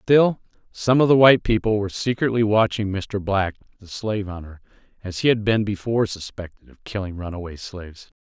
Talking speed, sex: 195 wpm, male